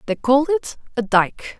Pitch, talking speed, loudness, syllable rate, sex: 255 Hz, 190 wpm, -19 LUFS, 5.6 syllables/s, female